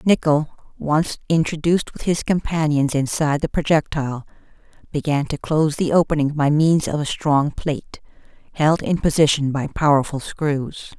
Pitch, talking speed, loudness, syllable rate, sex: 150 Hz, 140 wpm, -20 LUFS, 5.0 syllables/s, female